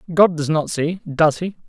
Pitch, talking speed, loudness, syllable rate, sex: 165 Hz, 215 wpm, -19 LUFS, 4.7 syllables/s, male